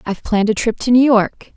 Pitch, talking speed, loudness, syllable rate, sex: 225 Hz, 270 wpm, -15 LUFS, 6.3 syllables/s, female